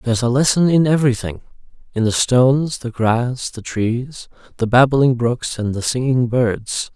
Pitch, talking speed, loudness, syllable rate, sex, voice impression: 125 Hz, 155 wpm, -17 LUFS, 4.5 syllables/s, male, very masculine, middle-aged, very thick, tensed, very powerful, slightly bright, soft, clear, slightly fluent, very cool, intellectual, refreshing, sincere, very calm, friendly, very reassuring, unique, slightly elegant, wild, slightly sweet, lively, kind, slightly modest